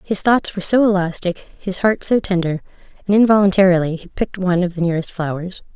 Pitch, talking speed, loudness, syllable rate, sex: 185 Hz, 190 wpm, -17 LUFS, 6.4 syllables/s, female